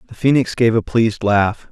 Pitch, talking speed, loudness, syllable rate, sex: 110 Hz, 210 wpm, -16 LUFS, 5.3 syllables/s, male